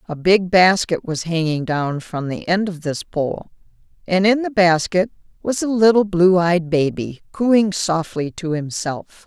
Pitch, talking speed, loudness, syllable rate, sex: 175 Hz, 170 wpm, -18 LUFS, 4.1 syllables/s, female